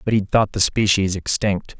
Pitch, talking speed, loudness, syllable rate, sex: 100 Hz, 200 wpm, -19 LUFS, 4.7 syllables/s, male